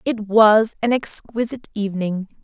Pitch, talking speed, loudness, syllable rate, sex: 215 Hz, 125 wpm, -19 LUFS, 4.8 syllables/s, female